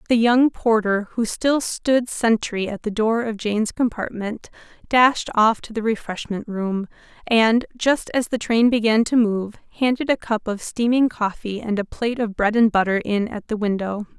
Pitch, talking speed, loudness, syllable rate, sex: 225 Hz, 185 wpm, -21 LUFS, 4.6 syllables/s, female